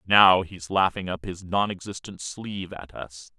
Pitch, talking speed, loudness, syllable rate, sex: 90 Hz, 160 wpm, -24 LUFS, 4.3 syllables/s, male